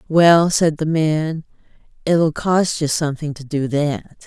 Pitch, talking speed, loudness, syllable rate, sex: 155 Hz, 155 wpm, -18 LUFS, 3.7 syllables/s, female